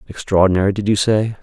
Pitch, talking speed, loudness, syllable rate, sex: 100 Hz, 170 wpm, -16 LUFS, 6.5 syllables/s, male